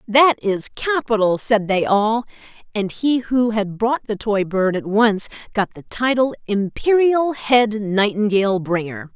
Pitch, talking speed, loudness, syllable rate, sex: 215 Hz, 150 wpm, -19 LUFS, 4.0 syllables/s, female